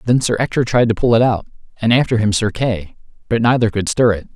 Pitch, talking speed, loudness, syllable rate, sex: 110 Hz, 250 wpm, -16 LUFS, 6.0 syllables/s, male